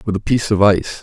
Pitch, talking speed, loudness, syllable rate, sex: 100 Hz, 295 wpm, -15 LUFS, 7.7 syllables/s, male